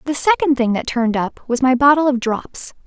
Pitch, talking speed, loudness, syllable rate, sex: 260 Hz, 230 wpm, -17 LUFS, 5.4 syllables/s, female